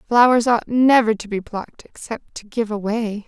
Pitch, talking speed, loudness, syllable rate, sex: 225 Hz, 185 wpm, -18 LUFS, 4.9 syllables/s, female